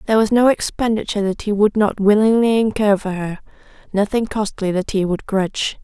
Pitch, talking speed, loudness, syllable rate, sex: 205 Hz, 185 wpm, -18 LUFS, 5.6 syllables/s, female